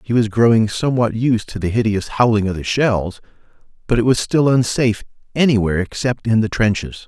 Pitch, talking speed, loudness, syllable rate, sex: 110 Hz, 185 wpm, -17 LUFS, 5.7 syllables/s, male